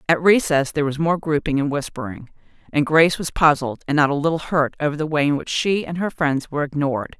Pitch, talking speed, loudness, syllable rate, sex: 150 Hz, 235 wpm, -20 LUFS, 6.3 syllables/s, female